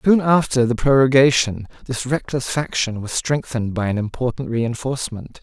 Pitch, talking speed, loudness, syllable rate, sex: 125 Hz, 145 wpm, -19 LUFS, 5.1 syllables/s, male